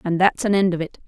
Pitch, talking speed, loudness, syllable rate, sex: 185 Hz, 335 wpm, -20 LUFS, 6.7 syllables/s, female